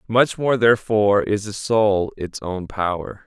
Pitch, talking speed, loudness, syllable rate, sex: 105 Hz, 165 wpm, -20 LUFS, 4.3 syllables/s, male